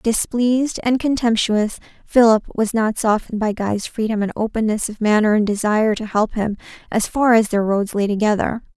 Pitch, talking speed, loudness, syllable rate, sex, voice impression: 220 Hz, 180 wpm, -18 LUFS, 5.2 syllables/s, female, feminine, slightly young, slightly soft, cute, friendly, kind